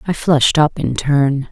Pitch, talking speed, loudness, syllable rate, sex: 145 Hz, 200 wpm, -15 LUFS, 4.4 syllables/s, female